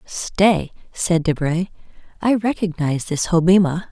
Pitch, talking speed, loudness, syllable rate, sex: 175 Hz, 105 wpm, -19 LUFS, 4.3 syllables/s, female